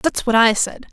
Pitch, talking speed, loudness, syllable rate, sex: 240 Hz, 260 wpm, -16 LUFS, 4.8 syllables/s, female